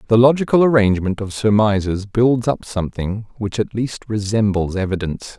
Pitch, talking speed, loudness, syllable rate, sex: 105 Hz, 145 wpm, -18 LUFS, 5.3 syllables/s, male